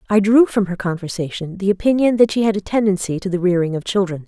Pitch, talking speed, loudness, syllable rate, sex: 195 Hz, 240 wpm, -18 LUFS, 6.4 syllables/s, female